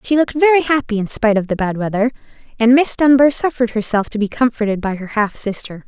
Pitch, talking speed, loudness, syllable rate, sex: 235 Hz, 225 wpm, -16 LUFS, 6.4 syllables/s, female